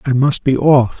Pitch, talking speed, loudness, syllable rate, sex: 135 Hz, 240 wpm, -13 LUFS, 4.5 syllables/s, male